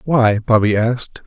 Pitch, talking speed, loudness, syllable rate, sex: 115 Hz, 145 wpm, -16 LUFS, 4.7 syllables/s, male